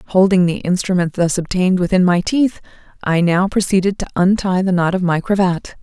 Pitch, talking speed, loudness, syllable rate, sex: 185 Hz, 185 wpm, -16 LUFS, 5.3 syllables/s, female